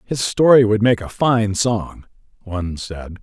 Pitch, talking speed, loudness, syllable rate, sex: 105 Hz, 165 wpm, -17 LUFS, 4.1 syllables/s, male